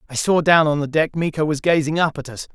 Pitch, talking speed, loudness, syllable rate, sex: 155 Hz, 285 wpm, -18 LUFS, 6.0 syllables/s, male